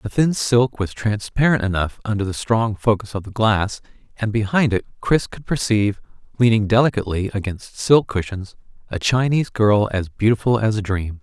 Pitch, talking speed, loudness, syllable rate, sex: 110 Hz, 170 wpm, -20 LUFS, 5.2 syllables/s, male